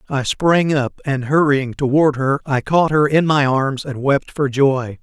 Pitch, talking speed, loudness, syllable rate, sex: 140 Hz, 205 wpm, -17 LUFS, 4.0 syllables/s, male